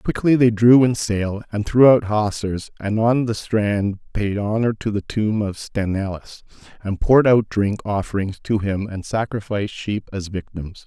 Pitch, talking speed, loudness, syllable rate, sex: 105 Hz, 175 wpm, -20 LUFS, 4.4 syllables/s, male